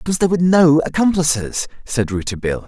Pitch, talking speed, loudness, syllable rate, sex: 150 Hz, 155 wpm, -17 LUFS, 7.5 syllables/s, male